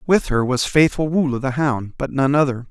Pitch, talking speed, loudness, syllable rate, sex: 140 Hz, 220 wpm, -19 LUFS, 5.2 syllables/s, male